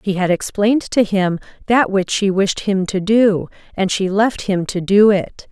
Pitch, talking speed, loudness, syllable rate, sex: 200 Hz, 205 wpm, -16 LUFS, 4.3 syllables/s, female